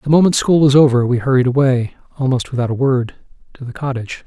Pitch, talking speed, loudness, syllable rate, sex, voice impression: 130 Hz, 210 wpm, -15 LUFS, 6.4 syllables/s, male, masculine, middle-aged, slightly dark, slightly sincere, calm, kind